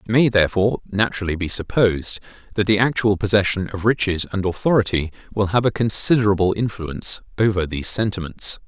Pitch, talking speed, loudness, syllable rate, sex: 100 Hz, 150 wpm, -19 LUFS, 6.1 syllables/s, male